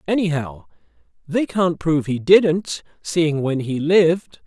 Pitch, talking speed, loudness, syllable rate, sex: 160 Hz, 135 wpm, -19 LUFS, 4.0 syllables/s, male